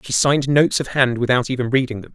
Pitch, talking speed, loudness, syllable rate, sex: 130 Hz, 250 wpm, -18 LUFS, 6.8 syllables/s, male